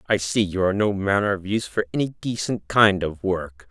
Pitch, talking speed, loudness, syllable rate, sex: 100 Hz, 225 wpm, -22 LUFS, 5.4 syllables/s, male